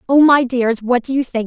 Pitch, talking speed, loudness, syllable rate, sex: 250 Hz, 285 wpm, -15 LUFS, 5.2 syllables/s, female